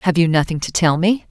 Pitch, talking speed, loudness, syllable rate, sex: 170 Hz, 275 wpm, -17 LUFS, 5.9 syllables/s, female